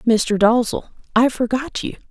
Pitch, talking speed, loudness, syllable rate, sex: 235 Hz, 145 wpm, -19 LUFS, 4.1 syllables/s, female